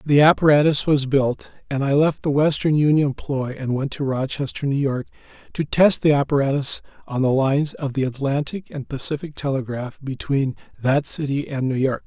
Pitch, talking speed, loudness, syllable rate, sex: 140 Hz, 180 wpm, -21 LUFS, 5.2 syllables/s, male